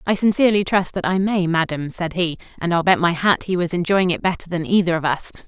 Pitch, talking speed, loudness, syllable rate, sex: 175 Hz, 250 wpm, -19 LUFS, 6.1 syllables/s, female